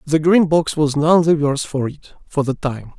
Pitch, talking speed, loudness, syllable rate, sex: 150 Hz, 240 wpm, -17 LUFS, 4.8 syllables/s, male